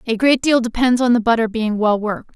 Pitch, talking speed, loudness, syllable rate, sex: 230 Hz, 255 wpm, -17 LUFS, 5.9 syllables/s, female